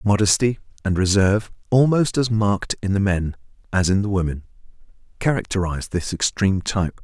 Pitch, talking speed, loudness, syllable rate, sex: 100 Hz, 145 wpm, -21 LUFS, 5.8 syllables/s, male